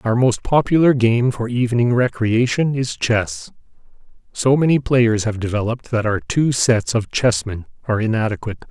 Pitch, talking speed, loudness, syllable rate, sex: 120 Hz, 150 wpm, -18 LUFS, 5.1 syllables/s, male